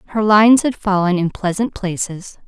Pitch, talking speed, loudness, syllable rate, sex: 200 Hz, 170 wpm, -16 LUFS, 5.2 syllables/s, female